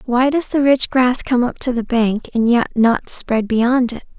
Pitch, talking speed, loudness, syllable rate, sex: 245 Hz, 230 wpm, -17 LUFS, 4.2 syllables/s, female